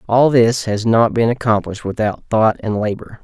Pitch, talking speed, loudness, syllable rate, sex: 115 Hz, 185 wpm, -16 LUFS, 4.9 syllables/s, male